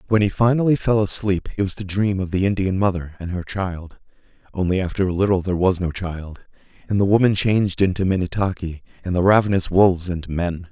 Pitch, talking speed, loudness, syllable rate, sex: 95 Hz, 200 wpm, -20 LUFS, 5.9 syllables/s, male